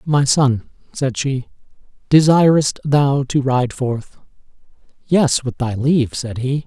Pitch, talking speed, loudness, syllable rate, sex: 135 Hz, 135 wpm, -17 LUFS, 3.7 syllables/s, male